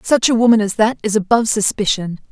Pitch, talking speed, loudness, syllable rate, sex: 220 Hz, 205 wpm, -15 LUFS, 6.2 syllables/s, female